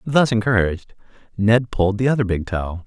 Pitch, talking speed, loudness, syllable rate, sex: 110 Hz, 170 wpm, -19 LUFS, 5.5 syllables/s, male